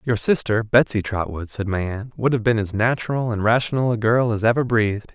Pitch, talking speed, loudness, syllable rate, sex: 110 Hz, 220 wpm, -21 LUFS, 5.5 syllables/s, male